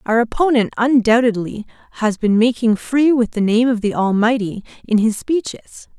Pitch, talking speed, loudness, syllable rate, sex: 230 Hz, 160 wpm, -17 LUFS, 4.8 syllables/s, female